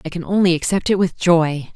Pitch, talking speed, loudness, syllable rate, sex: 175 Hz, 240 wpm, -17 LUFS, 5.5 syllables/s, female